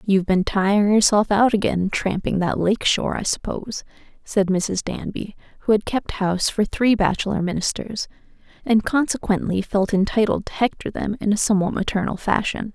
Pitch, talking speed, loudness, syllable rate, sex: 205 Hz, 165 wpm, -21 LUFS, 5.3 syllables/s, female